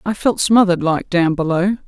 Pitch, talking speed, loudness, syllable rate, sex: 185 Hz, 190 wpm, -16 LUFS, 5.3 syllables/s, female